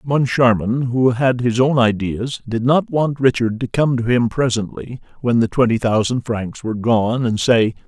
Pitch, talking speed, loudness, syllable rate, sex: 120 Hz, 185 wpm, -17 LUFS, 4.5 syllables/s, male